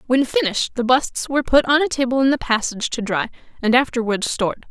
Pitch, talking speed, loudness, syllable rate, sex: 250 Hz, 215 wpm, -19 LUFS, 6.2 syllables/s, female